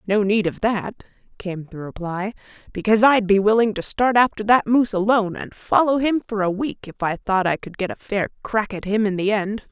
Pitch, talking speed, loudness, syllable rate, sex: 205 Hz, 230 wpm, -20 LUFS, 5.4 syllables/s, female